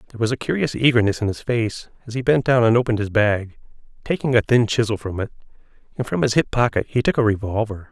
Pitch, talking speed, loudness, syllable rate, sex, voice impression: 115 Hz, 235 wpm, -20 LUFS, 6.7 syllables/s, male, very masculine, middle-aged, thick, slightly tensed, slightly weak, dark, slightly soft, slightly muffled, fluent, slightly raspy, slightly cool, very intellectual, slightly refreshing, sincere, very calm, very mature, slightly friendly, slightly reassuring, very unique, elegant, wild, slightly sweet, lively, intense, sharp